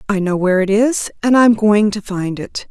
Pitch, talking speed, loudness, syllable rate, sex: 210 Hz, 265 wpm, -15 LUFS, 5.4 syllables/s, female